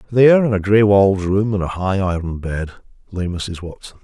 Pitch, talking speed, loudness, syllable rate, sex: 100 Hz, 210 wpm, -17 LUFS, 5.4 syllables/s, male